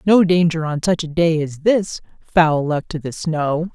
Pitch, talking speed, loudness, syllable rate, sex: 165 Hz, 210 wpm, -18 LUFS, 4.1 syllables/s, female